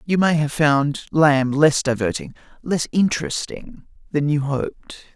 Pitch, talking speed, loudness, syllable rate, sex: 150 Hz, 140 wpm, -20 LUFS, 4.2 syllables/s, male